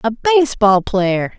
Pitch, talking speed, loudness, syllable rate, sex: 230 Hz, 175 wpm, -15 LUFS, 3.2 syllables/s, female